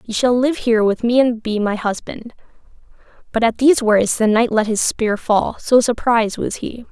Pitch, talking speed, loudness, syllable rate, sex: 230 Hz, 210 wpm, -17 LUFS, 5.0 syllables/s, female